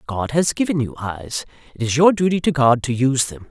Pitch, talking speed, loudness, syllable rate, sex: 135 Hz, 240 wpm, -19 LUFS, 5.6 syllables/s, male